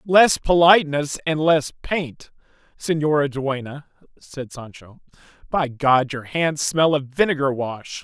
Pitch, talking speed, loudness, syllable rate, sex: 145 Hz, 125 wpm, -20 LUFS, 3.9 syllables/s, male